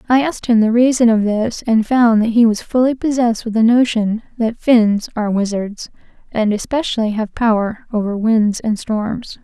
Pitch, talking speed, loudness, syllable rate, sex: 225 Hz, 185 wpm, -16 LUFS, 4.9 syllables/s, female